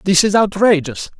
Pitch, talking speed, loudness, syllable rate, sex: 190 Hz, 150 wpm, -14 LUFS, 4.9 syllables/s, male